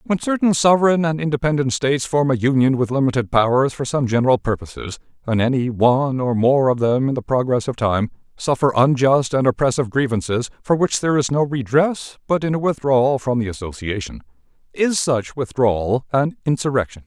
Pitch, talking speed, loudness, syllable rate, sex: 130 Hz, 180 wpm, -19 LUFS, 5.7 syllables/s, male